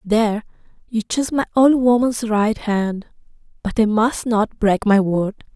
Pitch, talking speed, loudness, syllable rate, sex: 220 Hz, 160 wpm, -18 LUFS, 4.2 syllables/s, female